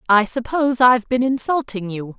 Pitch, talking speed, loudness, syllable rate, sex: 240 Hz, 165 wpm, -18 LUFS, 5.5 syllables/s, female